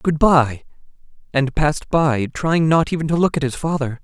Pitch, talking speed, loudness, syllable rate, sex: 150 Hz, 195 wpm, -18 LUFS, 5.1 syllables/s, male